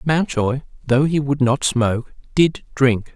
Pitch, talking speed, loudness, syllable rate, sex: 135 Hz, 150 wpm, -19 LUFS, 4.0 syllables/s, male